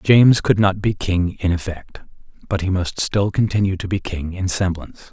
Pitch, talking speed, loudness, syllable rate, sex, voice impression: 95 Hz, 200 wpm, -19 LUFS, 5.0 syllables/s, male, very masculine, slightly old, very thick, very relaxed, slightly weak, dark, very soft, muffled, fluent, slightly raspy, very cool, intellectual, sincere, very calm, very mature, very friendly, very reassuring, unique, elegant, very wild, sweet, slightly lively, very kind, modest